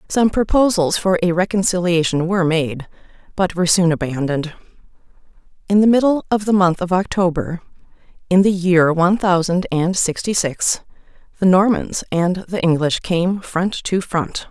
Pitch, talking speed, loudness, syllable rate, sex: 180 Hz, 150 wpm, -17 LUFS, 4.8 syllables/s, female